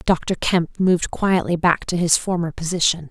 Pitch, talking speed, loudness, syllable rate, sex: 175 Hz, 175 wpm, -20 LUFS, 4.7 syllables/s, female